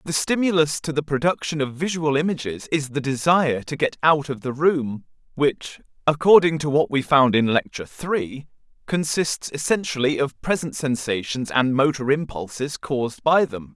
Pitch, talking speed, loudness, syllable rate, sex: 145 Hz, 160 wpm, -21 LUFS, 4.9 syllables/s, male